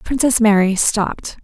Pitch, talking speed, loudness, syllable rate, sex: 215 Hz, 125 wpm, -15 LUFS, 4.7 syllables/s, female